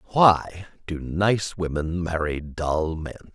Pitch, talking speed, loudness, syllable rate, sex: 85 Hz, 125 wpm, -24 LUFS, 3.4 syllables/s, male